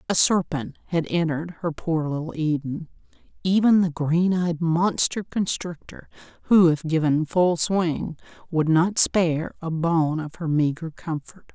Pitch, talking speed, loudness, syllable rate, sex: 165 Hz, 140 wpm, -23 LUFS, 4.2 syllables/s, female